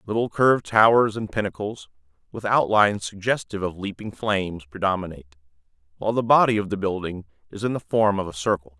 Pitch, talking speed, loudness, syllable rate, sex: 100 Hz, 170 wpm, -22 LUFS, 6.2 syllables/s, male